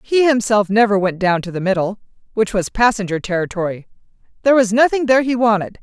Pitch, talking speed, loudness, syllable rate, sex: 215 Hz, 185 wpm, -16 LUFS, 6.3 syllables/s, female